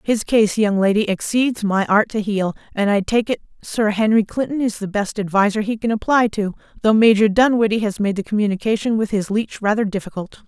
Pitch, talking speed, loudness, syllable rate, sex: 210 Hz, 205 wpm, -18 LUFS, 5.5 syllables/s, female